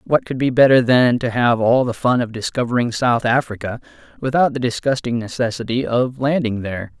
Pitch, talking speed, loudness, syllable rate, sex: 120 Hz, 180 wpm, -18 LUFS, 5.4 syllables/s, male